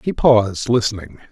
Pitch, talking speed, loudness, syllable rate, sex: 110 Hz, 135 wpm, -17 LUFS, 5.4 syllables/s, male